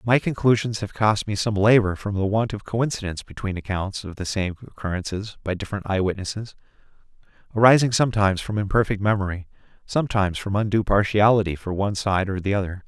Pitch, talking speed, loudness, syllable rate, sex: 105 Hz, 170 wpm, -22 LUFS, 6.2 syllables/s, male